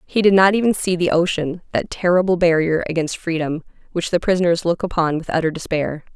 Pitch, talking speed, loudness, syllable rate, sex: 170 Hz, 195 wpm, -19 LUFS, 5.8 syllables/s, female